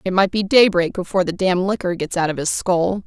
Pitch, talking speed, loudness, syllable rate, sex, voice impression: 185 Hz, 255 wpm, -18 LUFS, 6.1 syllables/s, female, feminine, slightly adult-like, slightly clear, slightly muffled, slightly refreshing, friendly